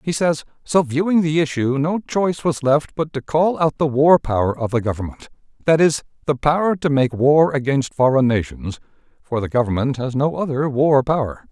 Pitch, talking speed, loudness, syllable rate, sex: 140 Hz, 200 wpm, -19 LUFS, 5.2 syllables/s, male